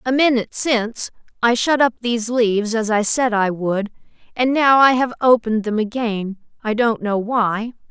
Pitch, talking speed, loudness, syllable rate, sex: 230 Hz, 180 wpm, -18 LUFS, 4.9 syllables/s, female